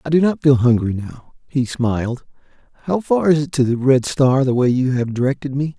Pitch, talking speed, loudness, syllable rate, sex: 135 Hz, 230 wpm, -18 LUFS, 5.2 syllables/s, male